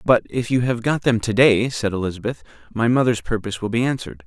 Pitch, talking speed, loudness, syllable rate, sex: 115 Hz, 225 wpm, -20 LUFS, 6.2 syllables/s, male